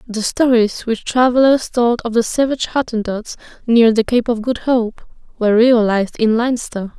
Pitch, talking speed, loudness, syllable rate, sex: 230 Hz, 165 wpm, -16 LUFS, 4.9 syllables/s, female